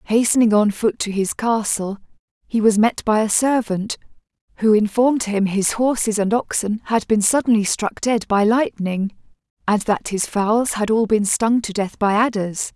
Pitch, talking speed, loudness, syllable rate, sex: 215 Hz, 180 wpm, -19 LUFS, 4.6 syllables/s, female